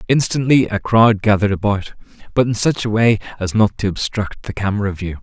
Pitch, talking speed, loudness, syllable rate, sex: 105 Hz, 195 wpm, -17 LUFS, 5.6 syllables/s, male